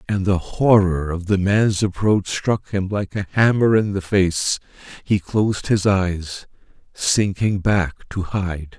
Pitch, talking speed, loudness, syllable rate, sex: 95 Hz, 155 wpm, -20 LUFS, 3.7 syllables/s, male